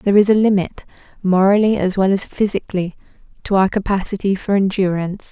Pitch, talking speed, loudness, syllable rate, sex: 195 Hz, 160 wpm, -17 LUFS, 6.1 syllables/s, female